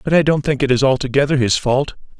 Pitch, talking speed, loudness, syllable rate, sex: 135 Hz, 245 wpm, -16 LUFS, 6.4 syllables/s, male